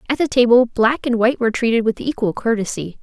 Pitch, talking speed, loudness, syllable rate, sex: 230 Hz, 220 wpm, -17 LUFS, 6.3 syllables/s, female